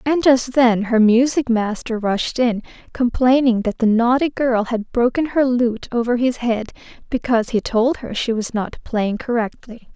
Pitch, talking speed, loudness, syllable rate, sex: 240 Hz, 175 wpm, -18 LUFS, 4.5 syllables/s, female